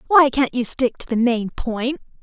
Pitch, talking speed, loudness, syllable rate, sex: 255 Hz, 215 wpm, -20 LUFS, 4.4 syllables/s, female